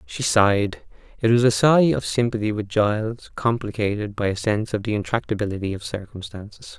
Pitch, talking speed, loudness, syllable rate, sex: 105 Hz, 170 wpm, -22 LUFS, 5.6 syllables/s, male